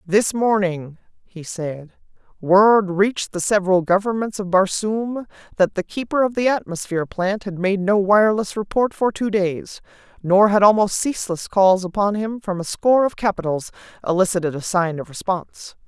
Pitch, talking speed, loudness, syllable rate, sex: 195 Hz, 165 wpm, -19 LUFS, 5.0 syllables/s, female